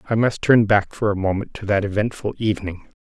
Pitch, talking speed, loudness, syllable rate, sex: 105 Hz, 220 wpm, -20 LUFS, 6.0 syllables/s, male